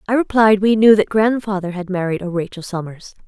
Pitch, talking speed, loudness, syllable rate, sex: 200 Hz, 200 wpm, -17 LUFS, 5.6 syllables/s, female